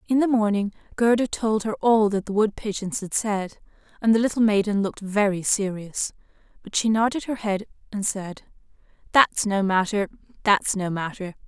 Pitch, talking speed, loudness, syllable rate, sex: 210 Hz, 165 wpm, -23 LUFS, 4.9 syllables/s, female